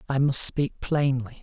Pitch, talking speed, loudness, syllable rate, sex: 135 Hz, 170 wpm, -22 LUFS, 4.0 syllables/s, male